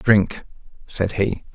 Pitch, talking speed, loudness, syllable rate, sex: 100 Hz, 115 wpm, -22 LUFS, 2.9 syllables/s, male